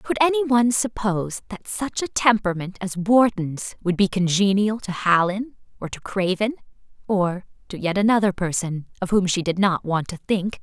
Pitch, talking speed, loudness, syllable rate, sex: 200 Hz, 165 wpm, -22 LUFS, 5.0 syllables/s, female